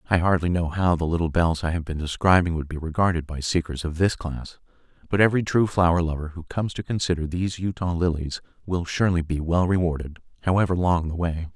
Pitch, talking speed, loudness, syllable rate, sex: 85 Hz, 210 wpm, -24 LUFS, 6.1 syllables/s, male